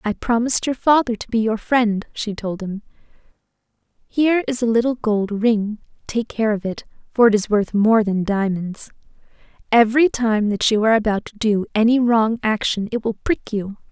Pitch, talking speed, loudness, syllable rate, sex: 220 Hz, 185 wpm, -19 LUFS, 5.1 syllables/s, female